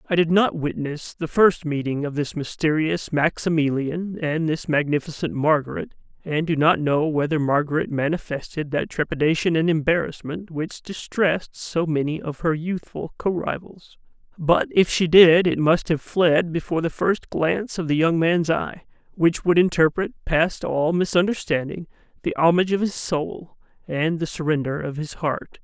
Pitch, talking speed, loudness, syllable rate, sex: 160 Hz, 160 wpm, -22 LUFS, 4.7 syllables/s, male